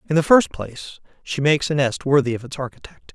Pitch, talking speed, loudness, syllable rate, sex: 140 Hz, 230 wpm, -20 LUFS, 6.2 syllables/s, male